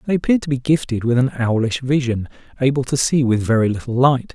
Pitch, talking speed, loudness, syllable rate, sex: 130 Hz, 220 wpm, -18 LUFS, 6.3 syllables/s, male